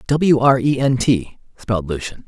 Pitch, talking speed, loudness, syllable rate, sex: 125 Hz, 185 wpm, -17 LUFS, 4.6 syllables/s, male